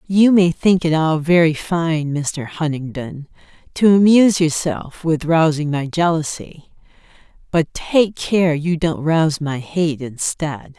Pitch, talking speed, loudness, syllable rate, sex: 160 Hz, 140 wpm, -17 LUFS, 3.8 syllables/s, female